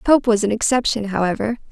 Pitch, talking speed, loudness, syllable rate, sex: 220 Hz, 175 wpm, -19 LUFS, 5.9 syllables/s, female